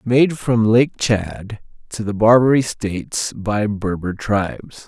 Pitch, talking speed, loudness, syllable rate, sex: 110 Hz, 135 wpm, -18 LUFS, 3.9 syllables/s, male